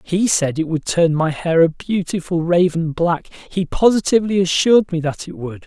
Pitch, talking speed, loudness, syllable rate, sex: 175 Hz, 180 wpm, -17 LUFS, 5.1 syllables/s, male